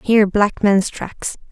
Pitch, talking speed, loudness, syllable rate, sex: 205 Hz, 160 wpm, -17 LUFS, 3.9 syllables/s, female